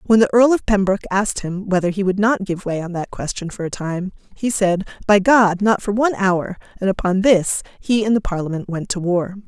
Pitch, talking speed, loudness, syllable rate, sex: 195 Hz, 235 wpm, -18 LUFS, 5.6 syllables/s, female